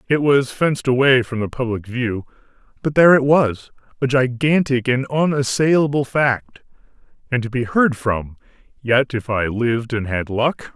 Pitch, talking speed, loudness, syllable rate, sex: 125 Hz, 155 wpm, -18 LUFS, 4.7 syllables/s, male